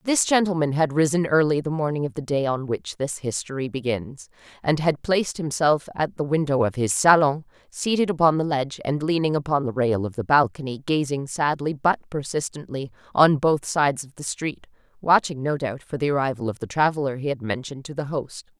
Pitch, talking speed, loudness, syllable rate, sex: 145 Hz, 200 wpm, -23 LUFS, 5.5 syllables/s, female